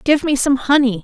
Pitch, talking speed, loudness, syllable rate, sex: 265 Hz, 235 wpm, -15 LUFS, 5.4 syllables/s, female